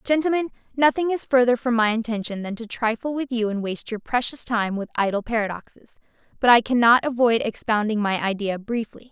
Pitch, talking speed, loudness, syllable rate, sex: 235 Hz, 185 wpm, -22 LUFS, 5.8 syllables/s, female